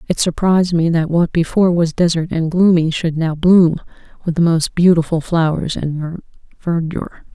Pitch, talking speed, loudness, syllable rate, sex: 165 Hz, 165 wpm, -16 LUFS, 5.1 syllables/s, female